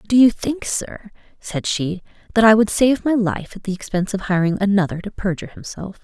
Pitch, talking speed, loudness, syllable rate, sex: 205 Hz, 220 wpm, -19 LUFS, 6.2 syllables/s, female